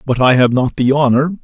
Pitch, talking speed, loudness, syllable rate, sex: 135 Hz, 250 wpm, -13 LUFS, 5.3 syllables/s, male